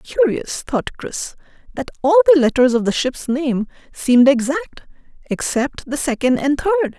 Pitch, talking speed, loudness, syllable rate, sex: 285 Hz, 155 wpm, -17 LUFS, 4.5 syllables/s, female